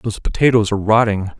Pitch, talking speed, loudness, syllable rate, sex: 105 Hz, 170 wpm, -16 LUFS, 7.1 syllables/s, male